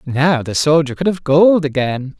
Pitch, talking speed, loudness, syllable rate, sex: 150 Hz, 190 wpm, -15 LUFS, 4.4 syllables/s, male